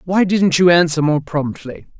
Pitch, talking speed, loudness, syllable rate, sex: 165 Hz, 180 wpm, -15 LUFS, 4.5 syllables/s, female